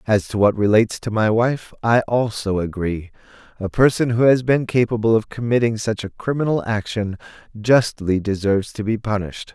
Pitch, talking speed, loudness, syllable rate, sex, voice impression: 110 Hz, 170 wpm, -19 LUFS, 5.2 syllables/s, male, very masculine, very adult-like, slightly old, very thick, tensed, very powerful, slightly dark, slightly soft, very clear, fluent, very cool, intellectual, slightly refreshing, sincere, very calm, very mature, very friendly, reassuring, unique, slightly elegant, very wild, sweet, lively, kind, slightly intense